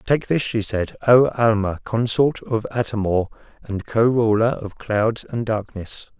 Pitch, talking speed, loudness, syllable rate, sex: 110 Hz, 165 wpm, -20 LUFS, 4.0 syllables/s, male